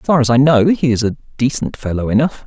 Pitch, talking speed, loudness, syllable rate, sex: 130 Hz, 270 wpm, -15 LUFS, 6.7 syllables/s, male